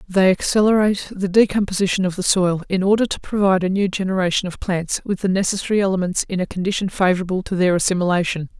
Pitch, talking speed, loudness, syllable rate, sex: 190 Hz, 190 wpm, -19 LUFS, 6.7 syllables/s, female